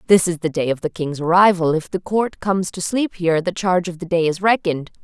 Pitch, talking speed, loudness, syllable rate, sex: 175 Hz, 260 wpm, -19 LUFS, 6.1 syllables/s, female